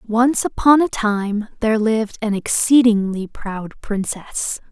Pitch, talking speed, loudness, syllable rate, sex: 220 Hz, 125 wpm, -18 LUFS, 3.9 syllables/s, female